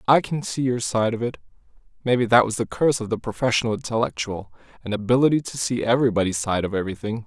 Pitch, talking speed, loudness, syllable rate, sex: 115 Hz, 200 wpm, -22 LUFS, 6.8 syllables/s, male